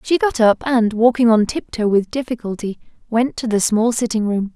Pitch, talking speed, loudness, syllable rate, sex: 225 Hz, 195 wpm, -18 LUFS, 5.1 syllables/s, female